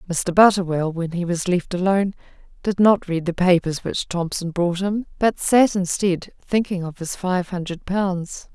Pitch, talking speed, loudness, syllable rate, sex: 180 Hz, 175 wpm, -21 LUFS, 4.5 syllables/s, female